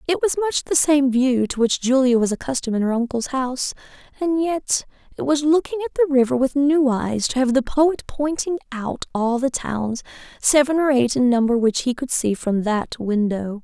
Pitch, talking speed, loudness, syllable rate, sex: 260 Hz, 205 wpm, -20 LUFS, 5.2 syllables/s, female